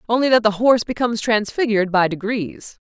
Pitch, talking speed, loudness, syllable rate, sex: 220 Hz, 165 wpm, -18 LUFS, 6.2 syllables/s, female